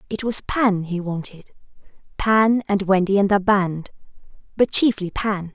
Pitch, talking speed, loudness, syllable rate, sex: 200 Hz, 150 wpm, -20 LUFS, 4.2 syllables/s, female